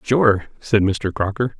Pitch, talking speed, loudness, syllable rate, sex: 105 Hz, 150 wpm, -19 LUFS, 3.6 syllables/s, male